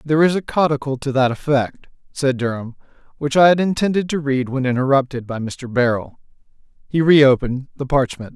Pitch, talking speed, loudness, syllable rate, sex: 140 Hz, 170 wpm, -18 LUFS, 5.7 syllables/s, male